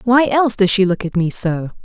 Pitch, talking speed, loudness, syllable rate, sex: 205 Hz, 260 wpm, -16 LUFS, 5.5 syllables/s, female